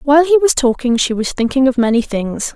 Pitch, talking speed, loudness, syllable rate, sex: 260 Hz, 235 wpm, -14 LUFS, 5.6 syllables/s, female